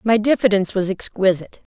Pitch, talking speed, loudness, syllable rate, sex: 205 Hz, 135 wpm, -18 LUFS, 6.5 syllables/s, female